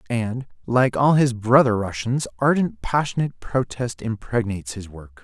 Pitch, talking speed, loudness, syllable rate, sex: 120 Hz, 140 wpm, -21 LUFS, 4.7 syllables/s, male